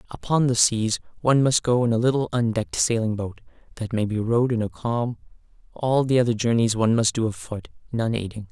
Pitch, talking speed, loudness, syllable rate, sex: 115 Hz, 205 wpm, -22 LUFS, 5.9 syllables/s, male